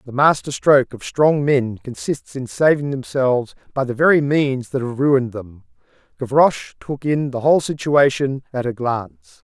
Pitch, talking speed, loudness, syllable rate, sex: 130 Hz, 170 wpm, -18 LUFS, 4.9 syllables/s, male